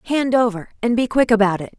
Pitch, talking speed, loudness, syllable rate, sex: 225 Hz, 235 wpm, -18 LUFS, 6.2 syllables/s, female